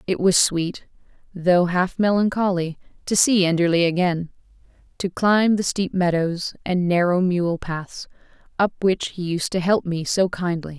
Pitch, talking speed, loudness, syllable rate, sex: 180 Hz, 155 wpm, -21 LUFS, 4.3 syllables/s, female